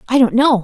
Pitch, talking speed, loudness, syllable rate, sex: 240 Hz, 285 wpm, -13 LUFS, 6.4 syllables/s, female